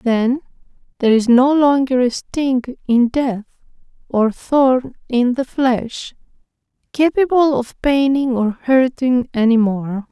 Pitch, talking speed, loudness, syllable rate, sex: 255 Hz, 125 wpm, -16 LUFS, 3.6 syllables/s, female